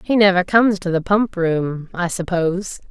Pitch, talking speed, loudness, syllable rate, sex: 185 Hz, 185 wpm, -18 LUFS, 4.8 syllables/s, female